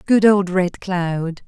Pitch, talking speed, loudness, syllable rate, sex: 185 Hz, 165 wpm, -18 LUFS, 3.0 syllables/s, female